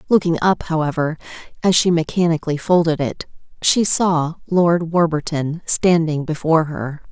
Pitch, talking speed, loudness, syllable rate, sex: 165 Hz, 125 wpm, -18 LUFS, 4.7 syllables/s, female